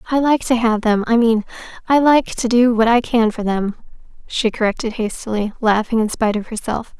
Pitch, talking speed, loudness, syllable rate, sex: 230 Hz, 195 wpm, -17 LUFS, 5.4 syllables/s, female